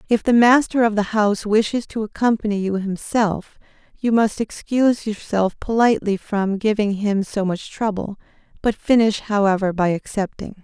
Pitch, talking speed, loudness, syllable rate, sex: 210 Hz, 150 wpm, -20 LUFS, 4.9 syllables/s, female